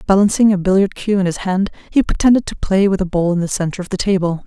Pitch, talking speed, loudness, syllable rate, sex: 190 Hz, 270 wpm, -16 LUFS, 6.6 syllables/s, female